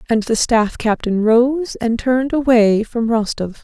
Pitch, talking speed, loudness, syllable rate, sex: 235 Hz, 165 wpm, -16 LUFS, 4.1 syllables/s, female